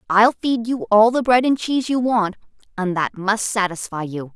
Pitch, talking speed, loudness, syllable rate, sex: 215 Hz, 205 wpm, -19 LUFS, 4.8 syllables/s, female